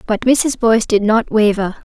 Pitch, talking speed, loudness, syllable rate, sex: 220 Hz, 190 wpm, -15 LUFS, 4.8 syllables/s, female